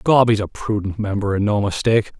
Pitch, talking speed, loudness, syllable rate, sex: 105 Hz, 220 wpm, -19 LUFS, 5.9 syllables/s, male